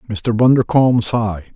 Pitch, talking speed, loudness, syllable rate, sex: 115 Hz, 115 wpm, -15 LUFS, 5.7 syllables/s, male